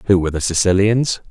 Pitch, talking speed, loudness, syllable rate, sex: 95 Hz, 185 wpm, -16 LUFS, 6.5 syllables/s, male